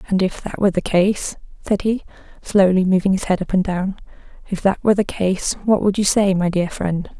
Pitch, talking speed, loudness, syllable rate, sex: 190 Hz, 225 wpm, -19 LUFS, 5.4 syllables/s, female